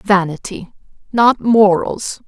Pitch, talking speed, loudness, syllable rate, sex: 200 Hz, 80 wpm, -14 LUFS, 3.3 syllables/s, female